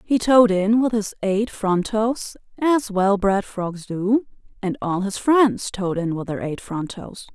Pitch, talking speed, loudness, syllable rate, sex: 210 Hz, 195 wpm, -21 LUFS, 3.7 syllables/s, female